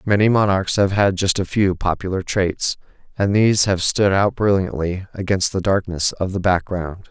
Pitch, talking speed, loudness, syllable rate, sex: 95 Hz, 175 wpm, -19 LUFS, 4.8 syllables/s, male